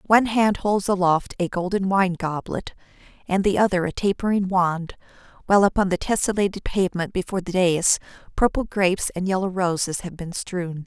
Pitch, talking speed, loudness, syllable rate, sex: 185 Hz, 165 wpm, -22 LUFS, 5.4 syllables/s, female